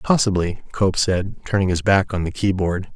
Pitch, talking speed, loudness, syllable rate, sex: 95 Hz, 180 wpm, -20 LUFS, 5.0 syllables/s, male